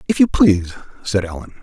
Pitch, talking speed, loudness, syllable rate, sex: 115 Hz, 185 wpm, -17 LUFS, 6.7 syllables/s, male